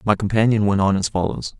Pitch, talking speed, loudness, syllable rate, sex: 100 Hz, 225 wpm, -19 LUFS, 6.1 syllables/s, male